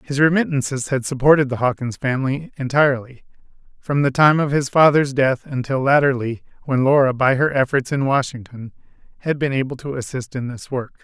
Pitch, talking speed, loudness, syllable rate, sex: 135 Hz, 175 wpm, -19 LUFS, 5.6 syllables/s, male